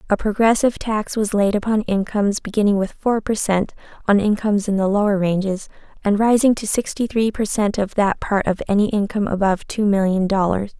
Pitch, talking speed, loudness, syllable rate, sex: 205 Hz, 195 wpm, -19 LUFS, 5.7 syllables/s, female